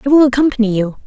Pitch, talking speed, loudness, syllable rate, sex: 245 Hz, 225 wpm, -13 LUFS, 7.8 syllables/s, female